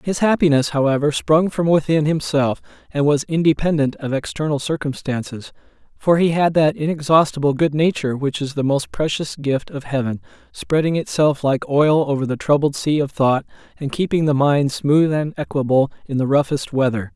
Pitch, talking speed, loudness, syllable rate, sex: 145 Hz, 170 wpm, -19 LUFS, 5.2 syllables/s, male